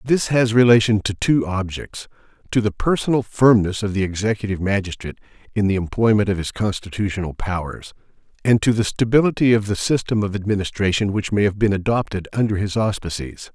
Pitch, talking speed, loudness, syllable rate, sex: 105 Hz, 170 wpm, -20 LUFS, 5.9 syllables/s, male